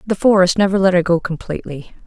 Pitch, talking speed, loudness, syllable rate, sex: 185 Hz, 205 wpm, -16 LUFS, 6.4 syllables/s, female